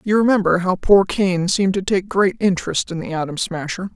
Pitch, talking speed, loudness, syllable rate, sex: 185 Hz, 215 wpm, -18 LUFS, 5.5 syllables/s, female